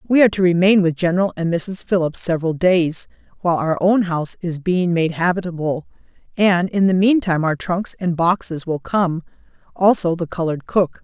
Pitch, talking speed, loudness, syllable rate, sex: 175 Hz, 180 wpm, -18 LUFS, 5.4 syllables/s, female